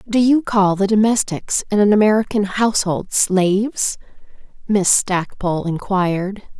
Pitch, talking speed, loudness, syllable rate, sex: 200 Hz, 120 wpm, -17 LUFS, 4.5 syllables/s, female